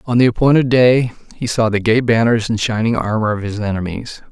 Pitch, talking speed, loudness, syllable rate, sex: 115 Hz, 210 wpm, -16 LUFS, 5.6 syllables/s, male